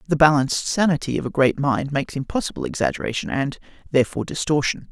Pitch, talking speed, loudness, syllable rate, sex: 145 Hz, 160 wpm, -21 LUFS, 6.9 syllables/s, male